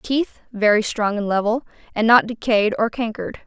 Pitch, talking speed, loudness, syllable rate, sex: 220 Hz, 155 wpm, -19 LUFS, 5.1 syllables/s, female